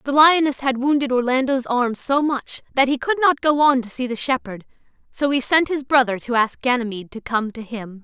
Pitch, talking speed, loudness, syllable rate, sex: 255 Hz, 225 wpm, -19 LUFS, 5.3 syllables/s, female